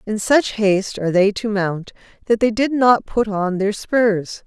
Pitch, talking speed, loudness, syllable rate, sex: 210 Hz, 200 wpm, -18 LUFS, 4.2 syllables/s, female